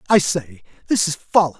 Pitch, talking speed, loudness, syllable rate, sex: 160 Hz, 190 wpm, -19 LUFS, 5.5 syllables/s, male